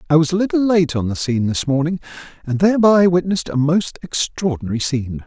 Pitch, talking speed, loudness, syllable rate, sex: 160 Hz, 195 wpm, -18 LUFS, 6.4 syllables/s, male